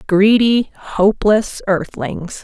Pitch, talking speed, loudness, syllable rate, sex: 200 Hz, 75 wpm, -16 LUFS, 3.1 syllables/s, female